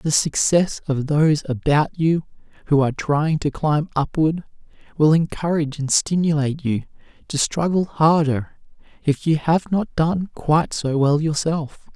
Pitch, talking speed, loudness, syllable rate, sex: 150 Hz, 145 wpm, -20 LUFS, 4.5 syllables/s, male